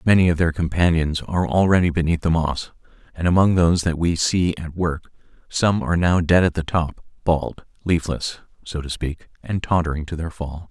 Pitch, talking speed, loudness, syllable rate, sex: 85 Hz, 190 wpm, -21 LUFS, 5.4 syllables/s, male